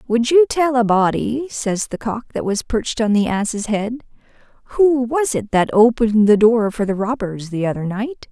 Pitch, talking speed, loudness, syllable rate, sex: 225 Hz, 200 wpm, -18 LUFS, 4.6 syllables/s, female